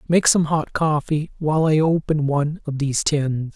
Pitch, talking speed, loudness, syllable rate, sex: 150 Hz, 185 wpm, -20 LUFS, 4.9 syllables/s, male